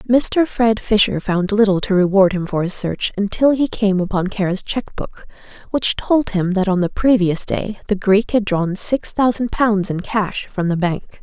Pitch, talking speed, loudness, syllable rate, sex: 205 Hz, 205 wpm, -18 LUFS, 4.6 syllables/s, female